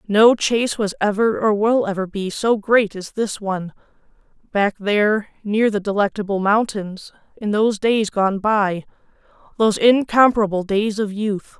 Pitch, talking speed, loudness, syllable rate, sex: 210 Hz, 145 wpm, -19 LUFS, 4.7 syllables/s, female